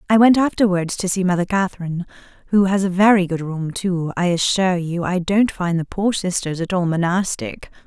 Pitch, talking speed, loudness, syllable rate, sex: 185 Hz, 200 wpm, -19 LUFS, 5.4 syllables/s, female